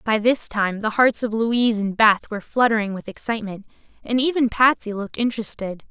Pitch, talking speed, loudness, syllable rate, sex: 220 Hz, 185 wpm, -21 LUFS, 5.7 syllables/s, female